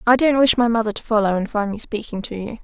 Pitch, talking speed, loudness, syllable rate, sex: 220 Hz, 295 wpm, -19 LUFS, 6.5 syllables/s, female